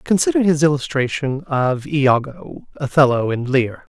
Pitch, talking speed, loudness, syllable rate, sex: 140 Hz, 120 wpm, -18 LUFS, 4.6 syllables/s, male